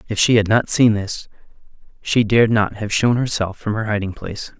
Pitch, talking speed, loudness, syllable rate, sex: 110 Hz, 210 wpm, -18 LUFS, 5.5 syllables/s, male